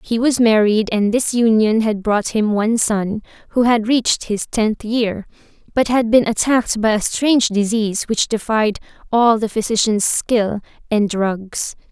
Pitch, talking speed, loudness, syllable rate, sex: 220 Hz, 165 wpm, -17 LUFS, 4.4 syllables/s, female